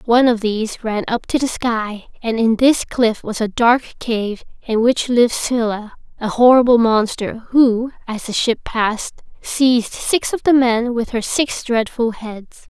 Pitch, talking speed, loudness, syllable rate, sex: 235 Hz, 180 wpm, -17 LUFS, 4.3 syllables/s, female